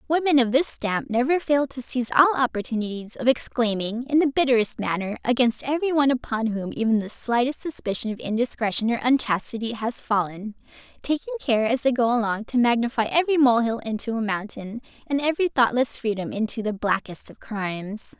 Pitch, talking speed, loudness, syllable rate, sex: 240 Hz, 180 wpm, -23 LUFS, 5.7 syllables/s, female